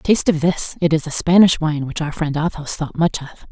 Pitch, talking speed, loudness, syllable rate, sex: 160 Hz, 255 wpm, -18 LUFS, 5.6 syllables/s, female